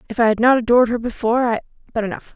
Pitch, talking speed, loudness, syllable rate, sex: 230 Hz, 230 wpm, -18 LUFS, 8.2 syllables/s, female